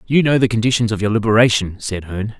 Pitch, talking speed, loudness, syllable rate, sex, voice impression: 110 Hz, 225 wpm, -16 LUFS, 6.8 syllables/s, male, masculine, adult-like, slightly clear, slightly refreshing, sincere